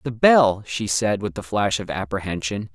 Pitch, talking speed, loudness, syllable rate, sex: 105 Hz, 195 wpm, -21 LUFS, 4.6 syllables/s, male